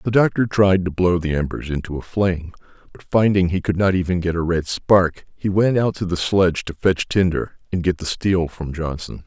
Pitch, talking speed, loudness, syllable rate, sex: 90 Hz, 225 wpm, -20 LUFS, 5.2 syllables/s, male